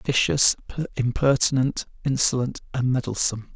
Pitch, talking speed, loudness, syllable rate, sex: 130 Hz, 85 wpm, -22 LUFS, 5.4 syllables/s, male